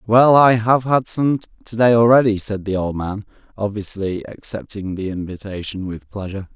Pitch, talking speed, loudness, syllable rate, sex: 105 Hz, 155 wpm, -18 LUFS, 5.0 syllables/s, male